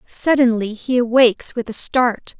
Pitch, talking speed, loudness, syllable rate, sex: 240 Hz, 150 wpm, -17 LUFS, 4.4 syllables/s, female